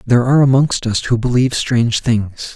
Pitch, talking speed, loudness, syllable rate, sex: 120 Hz, 190 wpm, -15 LUFS, 5.8 syllables/s, male